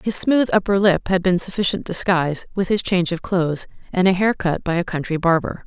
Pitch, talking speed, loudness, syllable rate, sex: 180 Hz, 220 wpm, -19 LUFS, 5.7 syllables/s, female